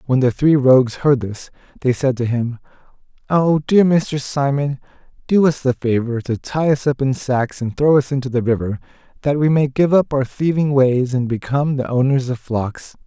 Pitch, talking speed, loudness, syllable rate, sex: 135 Hz, 200 wpm, -17 LUFS, 4.9 syllables/s, male